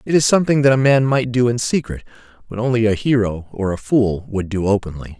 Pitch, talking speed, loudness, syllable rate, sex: 115 Hz, 230 wpm, -17 LUFS, 5.9 syllables/s, male